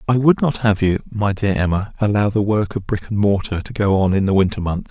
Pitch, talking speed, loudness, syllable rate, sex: 105 Hz, 270 wpm, -18 LUFS, 5.7 syllables/s, male